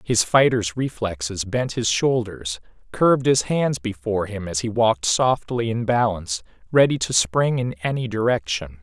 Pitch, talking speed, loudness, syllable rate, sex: 110 Hz, 155 wpm, -21 LUFS, 4.7 syllables/s, male